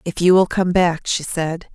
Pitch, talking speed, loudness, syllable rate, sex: 175 Hz, 240 wpm, -18 LUFS, 4.3 syllables/s, female